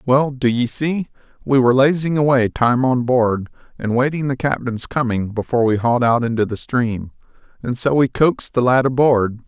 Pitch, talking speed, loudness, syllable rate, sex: 125 Hz, 190 wpm, -17 LUFS, 5.2 syllables/s, male